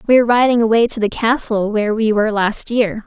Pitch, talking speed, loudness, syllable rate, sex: 220 Hz, 235 wpm, -16 LUFS, 6.2 syllables/s, female